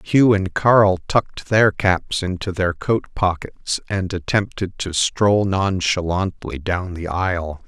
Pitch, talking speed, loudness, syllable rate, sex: 95 Hz, 140 wpm, -20 LUFS, 3.7 syllables/s, male